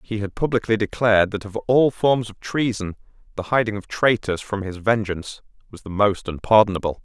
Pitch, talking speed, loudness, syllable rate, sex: 105 Hz, 180 wpm, -21 LUFS, 5.5 syllables/s, male